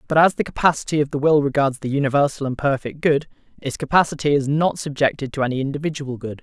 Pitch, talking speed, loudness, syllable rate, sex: 145 Hz, 205 wpm, -20 LUFS, 6.5 syllables/s, male